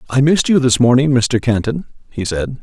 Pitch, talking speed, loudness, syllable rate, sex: 125 Hz, 205 wpm, -15 LUFS, 5.5 syllables/s, male